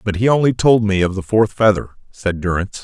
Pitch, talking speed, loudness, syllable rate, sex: 105 Hz, 230 wpm, -16 LUFS, 6.0 syllables/s, male